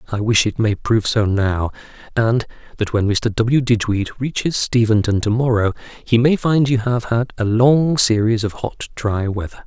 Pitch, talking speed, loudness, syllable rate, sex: 115 Hz, 185 wpm, -18 LUFS, 4.6 syllables/s, male